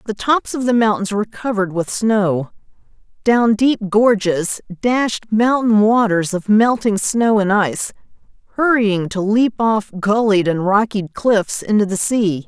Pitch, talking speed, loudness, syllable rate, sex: 210 Hz, 150 wpm, -16 LUFS, 4.2 syllables/s, female